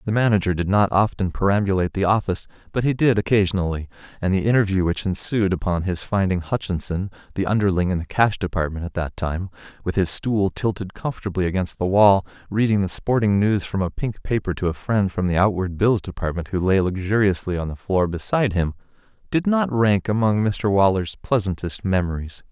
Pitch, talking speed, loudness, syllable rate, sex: 95 Hz, 185 wpm, -21 LUFS, 5.7 syllables/s, male